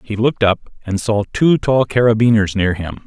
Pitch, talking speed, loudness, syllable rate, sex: 110 Hz, 195 wpm, -16 LUFS, 5.0 syllables/s, male